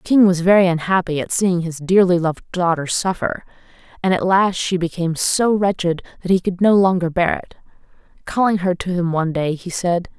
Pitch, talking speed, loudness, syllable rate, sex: 180 Hz, 200 wpm, -18 LUFS, 5.5 syllables/s, female